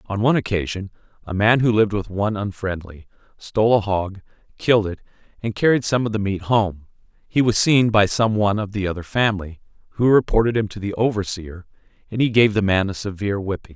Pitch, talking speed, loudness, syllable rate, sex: 105 Hz, 200 wpm, -20 LUFS, 6.0 syllables/s, male